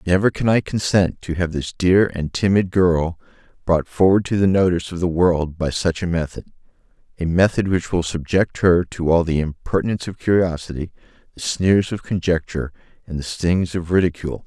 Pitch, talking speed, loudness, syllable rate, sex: 90 Hz, 185 wpm, -19 LUFS, 5.3 syllables/s, male